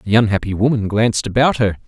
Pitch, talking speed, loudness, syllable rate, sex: 110 Hz, 190 wpm, -16 LUFS, 6.2 syllables/s, male